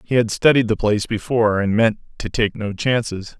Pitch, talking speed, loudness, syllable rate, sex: 110 Hz, 210 wpm, -19 LUFS, 5.5 syllables/s, male